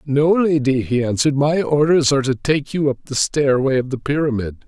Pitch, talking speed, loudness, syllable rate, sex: 140 Hz, 205 wpm, -18 LUFS, 5.5 syllables/s, male